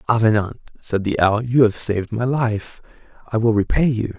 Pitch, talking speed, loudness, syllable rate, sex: 110 Hz, 185 wpm, -19 LUFS, 5.2 syllables/s, male